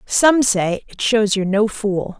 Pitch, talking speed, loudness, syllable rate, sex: 210 Hz, 190 wpm, -17 LUFS, 3.9 syllables/s, female